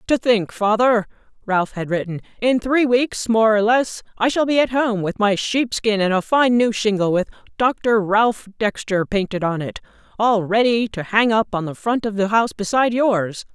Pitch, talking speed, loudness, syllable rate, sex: 215 Hz, 200 wpm, -19 LUFS, 4.7 syllables/s, female